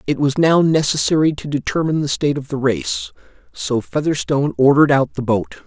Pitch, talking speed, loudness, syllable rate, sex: 140 Hz, 180 wpm, -17 LUFS, 5.8 syllables/s, male